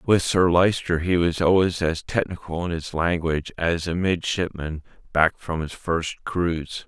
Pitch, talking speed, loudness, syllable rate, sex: 85 Hz, 165 wpm, -23 LUFS, 4.3 syllables/s, male